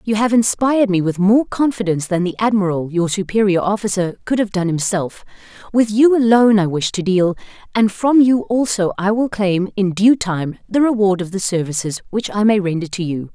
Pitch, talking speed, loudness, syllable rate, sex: 200 Hz, 200 wpm, -17 LUFS, 5.3 syllables/s, female